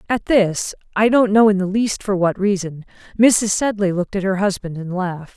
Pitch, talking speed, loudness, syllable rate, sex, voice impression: 195 Hz, 215 wpm, -18 LUFS, 5.2 syllables/s, female, very feminine, slightly adult-like, thin, tensed, powerful, very bright, soft, very clear, very fluent, cute, intellectual, very refreshing, sincere, calm, very friendly, very reassuring, unique, elegant, wild, very sweet, very lively, kind, intense, light